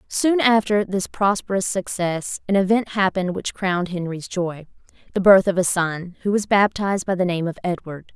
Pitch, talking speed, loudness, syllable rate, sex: 190 Hz, 175 wpm, -21 LUFS, 5.1 syllables/s, female